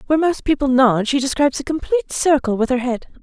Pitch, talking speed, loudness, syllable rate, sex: 275 Hz, 225 wpm, -18 LUFS, 6.5 syllables/s, female